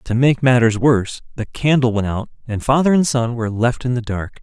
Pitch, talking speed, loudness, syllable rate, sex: 120 Hz, 230 wpm, -17 LUFS, 5.5 syllables/s, male